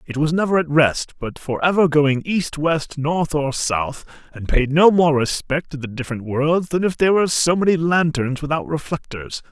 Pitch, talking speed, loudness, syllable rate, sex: 155 Hz, 200 wpm, -19 LUFS, 4.8 syllables/s, male